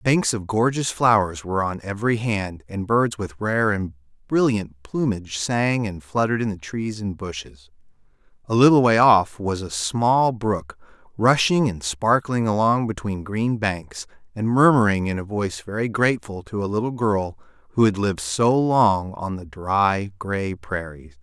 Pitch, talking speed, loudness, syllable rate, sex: 105 Hz, 165 wpm, -21 LUFS, 4.4 syllables/s, male